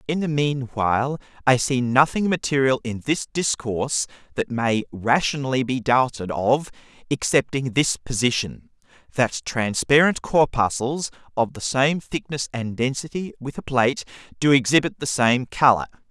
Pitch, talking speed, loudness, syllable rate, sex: 130 Hz, 140 wpm, -22 LUFS, 4.6 syllables/s, male